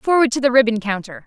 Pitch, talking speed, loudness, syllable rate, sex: 245 Hz, 240 wpm, -17 LUFS, 6.5 syllables/s, female